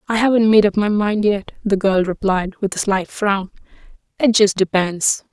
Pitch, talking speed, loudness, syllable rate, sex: 200 Hz, 190 wpm, -17 LUFS, 4.8 syllables/s, female